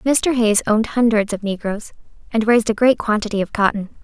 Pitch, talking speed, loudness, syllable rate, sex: 220 Hz, 195 wpm, -18 LUFS, 5.8 syllables/s, female